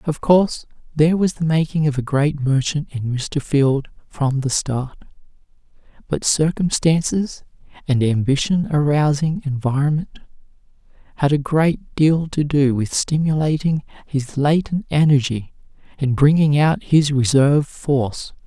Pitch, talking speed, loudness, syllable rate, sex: 145 Hz, 125 wpm, -19 LUFS, 4.3 syllables/s, male